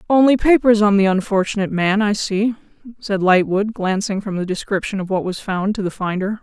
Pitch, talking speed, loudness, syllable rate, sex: 200 Hz, 195 wpm, -18 LUFS, 5.5 syllables/s, female